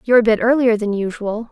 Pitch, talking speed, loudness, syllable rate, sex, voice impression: 225 Hz, 240 wpm, -17 LUFS, 6.4 syllables/s, female, feminine, adult-like, relaxed, powerful, bright, soft, fluent, intellectual, friendly, reassuring, elegant, lively, kind